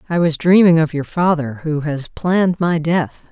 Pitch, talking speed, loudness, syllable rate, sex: 160 Hz, 200 wpm, -16 LUFS, 4.7 syllables/s, female